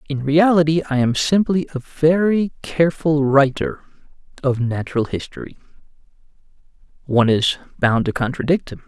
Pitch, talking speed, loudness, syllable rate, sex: 145 Hz, 120 wpm, -18 LUFS, 5.2 syllables/s, male